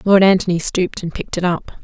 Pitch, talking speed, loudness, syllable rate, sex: 180 Hz, 230 wpm, -17 LUFS, 6.7 syllables/s, female